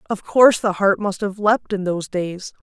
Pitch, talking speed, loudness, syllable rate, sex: 200 Hz, 225 wpm, -19 LUFS, 5.5 syllables/s, female